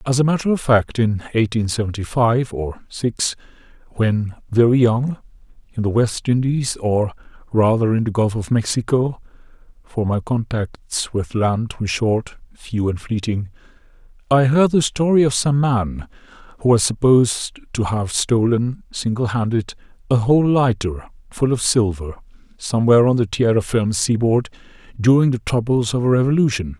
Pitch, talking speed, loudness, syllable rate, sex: 115 Hz, 150 wpm, -19 LUFS, 4.8 syllables/s, male